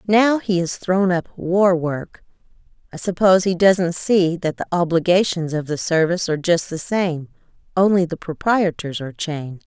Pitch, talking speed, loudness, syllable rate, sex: 175 Hz, 165 wpm, -19 LUFS, 4.8 syllables/s, female